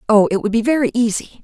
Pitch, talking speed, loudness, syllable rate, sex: 225 Hz, 250 wpm, -17 LUFS, 6.4 syllables/s, female